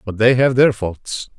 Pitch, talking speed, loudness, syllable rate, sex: 115 Hz, 215 wpm, -16 LUFS, 4.1 syllables/s, male